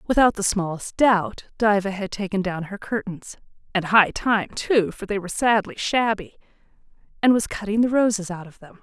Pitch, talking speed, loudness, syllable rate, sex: 200 Hz, 185 wpm, -22 LUFS, 3.8 syllables/s, female